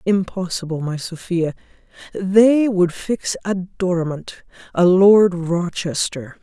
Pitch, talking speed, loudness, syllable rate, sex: 180 Hz, 105 wpm, -18 LUFS, 3.7 syllables/s, female